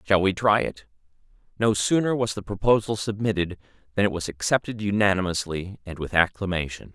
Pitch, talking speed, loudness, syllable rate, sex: 100 Hz, 155 wpm, -24 LUFS, 5.6 syllables/s, male